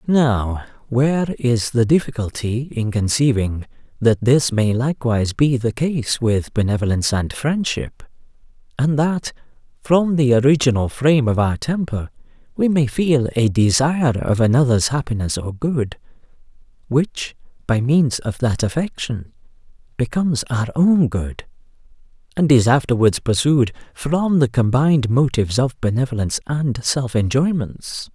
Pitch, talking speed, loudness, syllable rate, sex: 130 Hz, 130 wpm, -18 LUFS, 4.5 syllables/s, male